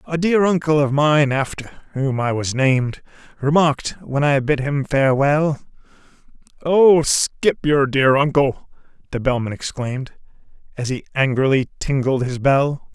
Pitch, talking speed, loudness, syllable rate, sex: 140 Hz, 140 wpm, -18 LUFS, 4.3 syllables/s, male